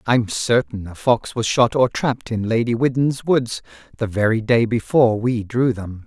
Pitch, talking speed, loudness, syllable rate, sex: 115 Hz, 190 wpm, -19 LUFS, 4.7 syllables/s, male